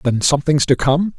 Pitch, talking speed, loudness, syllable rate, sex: 145 Hz, 205 wpm, -16 LUFS, 5.6 syllables/s, male